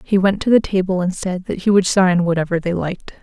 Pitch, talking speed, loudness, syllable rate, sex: 185 Hz, 260 wpm, -17 LUFS, 5.9 syllables/s, female